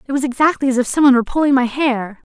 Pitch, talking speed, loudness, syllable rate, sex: 260 Hz, 260 wpm, -16 LUFS, 7.6 syllables/s, female